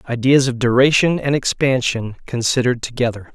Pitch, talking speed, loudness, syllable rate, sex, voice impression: 125 Hz, 125 wpm, -17 LUFS, 5.5 syllables/s, male, masculine, adult-like, slightly tensed, slightly powerful, clear, fluent, slightly raspy, cool, intellectual, calm, wild, lively, slightly sharp